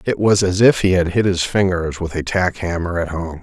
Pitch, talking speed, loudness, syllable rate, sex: 90 Hz, 265 wpm, -17 LUFS, 5.1 syllables/s, male